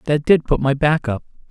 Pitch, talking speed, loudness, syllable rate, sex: 145 Hz, 240 wpm, -18 LUFS, 5.4 syllables/s, male